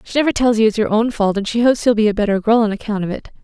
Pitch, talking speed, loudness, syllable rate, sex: 220 Hz, 350 wpm, -16 LUFS, 7.4 syllables/s, female